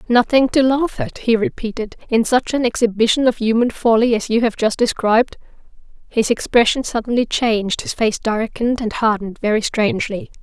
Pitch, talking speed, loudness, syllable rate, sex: 225 Hz, 165 wpm, -17 LUFS, 5.5 syllables/s, female